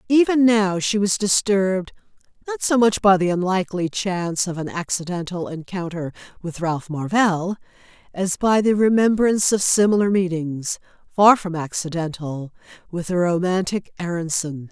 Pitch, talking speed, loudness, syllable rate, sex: 185 Hz, 130 wpm, -20 LUFS, 4.7 syllables/s, female